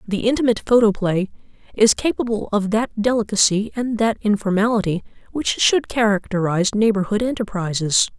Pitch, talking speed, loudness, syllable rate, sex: 215 Hz, 115 wpm, -19 LUFS, 5.5 syllables/s, female